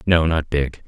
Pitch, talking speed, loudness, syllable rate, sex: 80 Hz, 205 wpm, -20 LUFS, 4.2 syllables/s, male